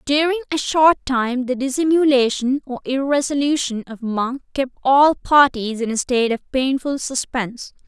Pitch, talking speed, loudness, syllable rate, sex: 265 Hz, 145 wpm, -19 LUFS, 4.7 syllables/s, female